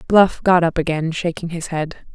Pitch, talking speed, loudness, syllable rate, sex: 170 Hz, 195 wpm, -19 LUFS, 5.0 syllables/s, female